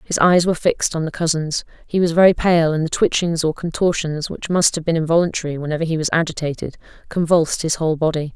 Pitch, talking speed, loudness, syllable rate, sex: 160 Hz, 210 wpm, -18 LUFS, 6.3 syllables/s, female